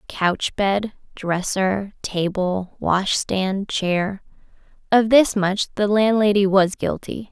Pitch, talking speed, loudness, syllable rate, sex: 195 Hz, 100 wpm, -20 LUFS, 3.1 syllables/s, female